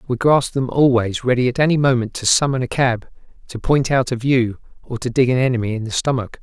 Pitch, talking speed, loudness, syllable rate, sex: 125 Hz, 235 wpm, -18 LUFS, 5.8 syllables/s, male